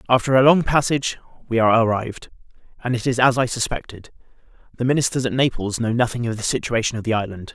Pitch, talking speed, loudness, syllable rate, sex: 120 Hz, 190 wpm, -20 LUFS, 6.7 syllables/s, male